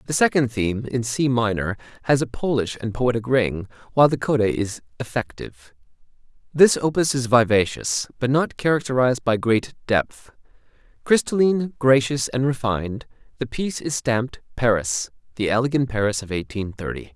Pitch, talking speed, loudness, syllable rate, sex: 120 Hz, 145 wpm, -21 LUFS, 5.3 syllables/s, male